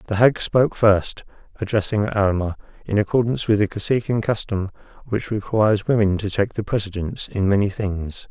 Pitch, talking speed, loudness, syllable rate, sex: 105 Hz, 160 wpm, -21 LUFS, 5.5 syllables/s, male